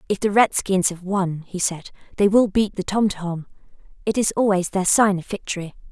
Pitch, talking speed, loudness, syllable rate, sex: 195 Hz, 205 wpm, -21 LUFS, 5.1 syllables/s, female